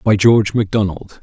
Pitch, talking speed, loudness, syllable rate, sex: 105 Hz, 145 wpm, -15 LUFS, 5.3 syllables/s, male